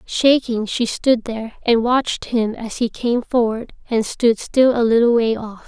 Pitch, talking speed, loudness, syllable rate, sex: 230 Hz, 190 wpm, -18 LUFS, 4.3 syllables/s, female